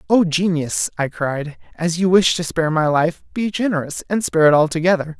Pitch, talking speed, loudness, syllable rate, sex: 165 Hz, 195 wpm, -18 LUFS, 5.3 syllables/s, male